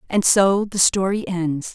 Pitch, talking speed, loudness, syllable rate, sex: 190 Hz, 170 wpm, -18 LUFS, 3.8 syllables/s, female